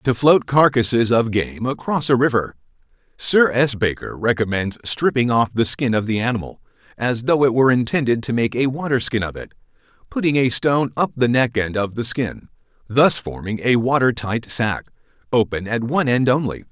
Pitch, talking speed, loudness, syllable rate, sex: 120 Hz, 185 wpm, -19 LUFS, 5.2 syllables/s, male